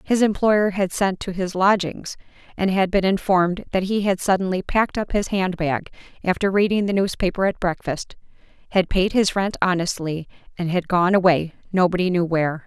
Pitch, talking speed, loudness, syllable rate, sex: 185 Hz, 180 wpm, -21 LUFS, 5.3 syllables/s, female